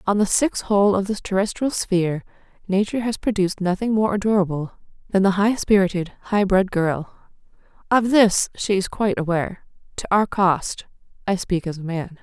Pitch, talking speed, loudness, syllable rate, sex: 195 Hz, 160 wpm, -21 LUFS, 5.2 syllables/s, female